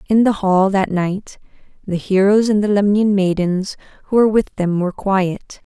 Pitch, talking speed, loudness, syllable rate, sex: 195 Hz, 180 wpm, -16 LUFS, 4.7 syllables/s, female